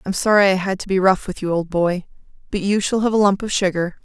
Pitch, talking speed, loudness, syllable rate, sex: 190 Hz, 280 wpm, -19 LUFS, 6.0 syllables/s, female